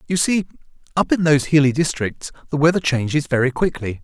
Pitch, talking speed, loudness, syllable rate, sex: 150 Hz, 180 wpm, -19 LUFS, 6.0 syllables/s, male